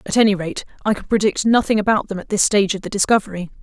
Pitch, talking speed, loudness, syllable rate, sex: 205 Hz, 250 wpm, -18 LUFS, 7.2 syllables/s, female